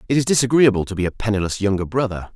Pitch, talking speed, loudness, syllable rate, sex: 110 Hz, 230 wpm, -19 LUFS, 7.4 syllables/s, male